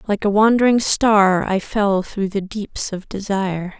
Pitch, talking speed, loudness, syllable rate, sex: 200 Hz, 175 wpm, -18 LUFS, 4.2 syllables/s, female